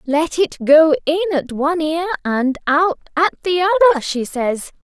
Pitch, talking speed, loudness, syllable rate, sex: 315 Hz, 170 wpm, -17 LUFS, 5.0 syllables/s, female